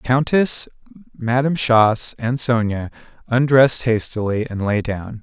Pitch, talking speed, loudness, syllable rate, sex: 120 Hz, 125 wpm, -18 LUFS, 4.4 syllables/s, male